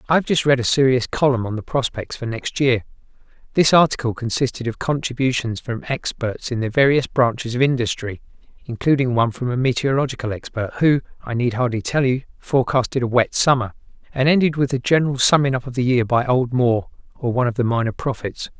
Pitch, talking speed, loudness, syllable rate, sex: 125 Hz, 195 wpm, -20 LUFS, 4.6 syllables/s, male